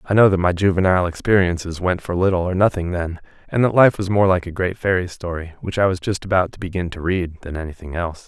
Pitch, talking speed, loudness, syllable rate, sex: 90 Hz, 245 wpm, -20 LUFS, 6.4 syllables/s, male